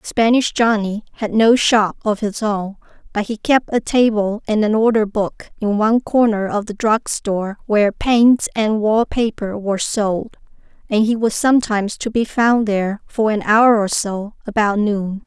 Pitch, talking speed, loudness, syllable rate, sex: 215 Hz, 180 wpm, -17 LUFS, 4.5 syllables/s, female